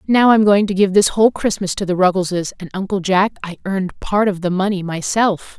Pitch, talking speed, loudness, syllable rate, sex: 195 Hz, 225 wpm, -17 LUFS, 5.6 syllables/s, female